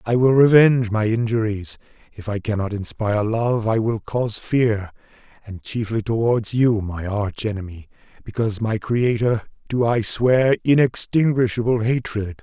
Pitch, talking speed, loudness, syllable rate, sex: 110 Hz, 140 wpm, -20 LUFS, 4.6 syllables/s, male